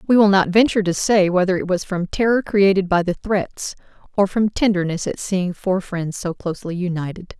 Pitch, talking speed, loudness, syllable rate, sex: 190 Hz, 205 wpm, -19 LUFS, 5.3 syllables/s, female